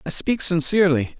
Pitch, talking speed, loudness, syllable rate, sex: 165 Hz, 150 wpm, -18 LUFS, 5.7 syllables/s, male